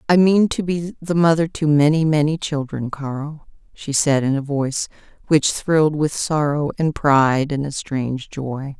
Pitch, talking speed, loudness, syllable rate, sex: 150 Hz, 175 wpm, -19 LUFS, 4.4 syllables/s, female